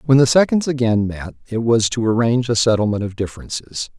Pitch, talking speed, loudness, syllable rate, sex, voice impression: 115 Hz, 195 wpm, -18 LUFS, 6.0 syllables/s, male, very masculine, very adult-like, slightly old, very thick, slightly tensed, very powerful, slightly bright, soft, slightly muffled, fluent, very cool, very intellectual, sincere, very calm, very mature, very friendly, reassuring, unique, very elegant, wild, slightly sweet, slightly lively, kind, slightly modest